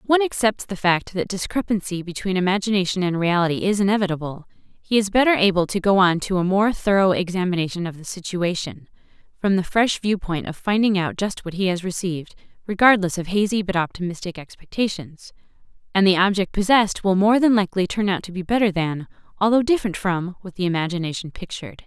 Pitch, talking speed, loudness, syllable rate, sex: 190 Hz, 185 wpm, -21 LUFS, 6.1 syllables/s, female